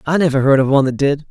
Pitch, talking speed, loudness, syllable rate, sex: 140 Hz, 320 wpm, -14 LUFS, 7.7 syllables/s, male